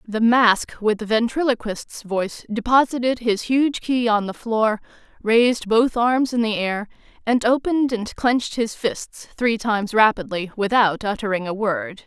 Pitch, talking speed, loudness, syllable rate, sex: 225 Hz, 160 wpm, -20 LUFS, 4.5 syllables/s, female